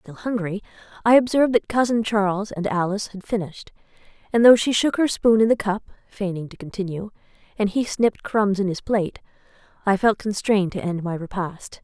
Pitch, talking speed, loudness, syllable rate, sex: 205 Hz, 190 wpm, -22 LUFS, 5.7 syllables/s, female